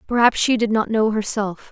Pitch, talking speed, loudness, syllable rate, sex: 220 Hz, 210 wpm, -19 LUFS, 5.2 syllables/s, female